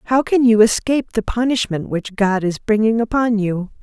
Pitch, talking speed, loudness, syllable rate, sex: 220 Hz, 190 wpm, -17 LUFS, 5.1 syllables/s, female